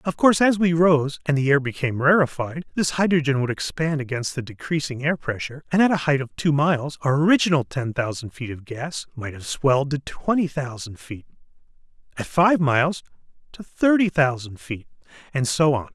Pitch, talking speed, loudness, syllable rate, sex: 145 Hz, 190 wpm, -22 LUFS, 5.4 syllables/s, male